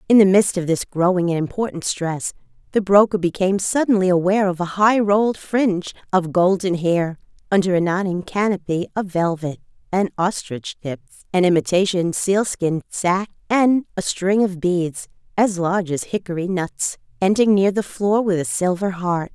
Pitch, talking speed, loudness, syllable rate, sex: 185 Hz, 165 wpm, -20 LUFS, 5.0 syllables/s, female